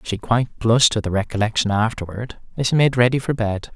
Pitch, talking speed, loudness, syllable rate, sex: 115 Hz, 210 wpm, -19 LUFS, 6.0 syllables/s, male